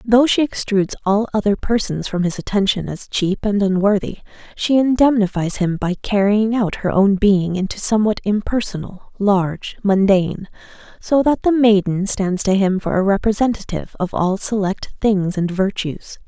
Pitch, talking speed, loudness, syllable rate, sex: 200 Hz, 160 wpm, -18 LUFS, 4.9 syllables/s, female